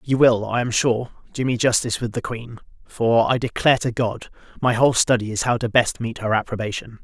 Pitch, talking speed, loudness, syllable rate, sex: 115 Hz, 220 wpm, -20 LUFS, 5.7 syllables/s, male